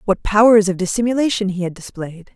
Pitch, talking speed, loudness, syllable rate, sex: 200 Hz, 180 wpm, -16 LUFS, 5.8 syllables/s, female